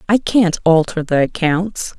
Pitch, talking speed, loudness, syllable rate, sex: 180 Hz, 150 wpm, -16 LUFS, 4.0 syllables/s, female